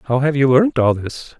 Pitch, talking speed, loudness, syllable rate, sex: 135 Hz, 260 wpm, -16 LUFS, 4.4 syllables/s, male